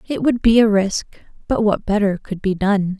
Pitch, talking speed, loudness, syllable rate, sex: 205 Hz, 220 wpm, -18 LUFS, 5.0 syllables/s, female